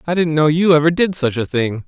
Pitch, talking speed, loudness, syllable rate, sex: 155 Hz, 290 wpm, -16 LUFS, 5.8 syllables/s, male